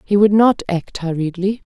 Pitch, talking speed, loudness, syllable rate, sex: 195 Hz, 175 wpm, -17 LUFS, 4.7 syllables/s, female